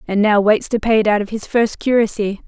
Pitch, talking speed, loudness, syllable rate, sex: 215 Hz, 265 wpm, -16 LUFS, 5.6 syllables/s, female